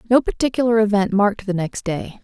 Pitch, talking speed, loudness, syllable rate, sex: 210 Hz, 190 wpm, -19 LUFS, 5.9 syllables/s, female